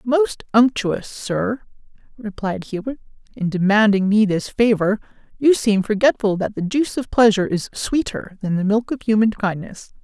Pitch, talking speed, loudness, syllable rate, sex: 215 Hz, 155 wpm, -19 LUFS, 4.8 syllables/s, female